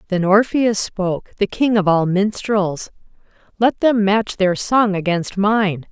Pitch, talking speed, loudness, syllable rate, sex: 200 Hz, 150 wpm, -17 LUFS, 3.9 syllables/s, female